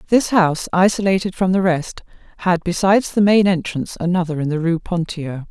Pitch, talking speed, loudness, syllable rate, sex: 180 Hz, 175 wpm, -18 LUFS, 5.6 syllables/s, female